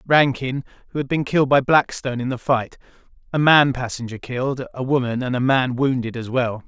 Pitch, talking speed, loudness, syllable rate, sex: 130 Hz, 200 wpm, -20 LUFS, 5.6 syllables/s, male